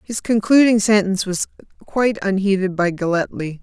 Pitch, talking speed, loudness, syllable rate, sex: 200 Hz, 135 wpm, -18 LUFS, 5.4 syllables/s, female